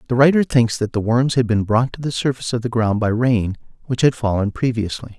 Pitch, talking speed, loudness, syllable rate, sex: 120 Hz, 245 wpm, -19 LUFS, 5.8 syllables/s, male